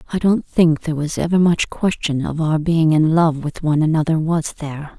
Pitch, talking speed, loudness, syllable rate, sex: 160 Hz, 215 wpm, -18 LUFS, 5.4 syllables/s, female